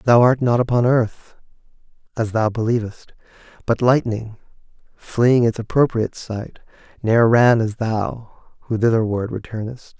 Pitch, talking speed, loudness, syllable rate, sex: 115 Hz, 125 wpm, -19 LUFS, 4.5 syllables/s, male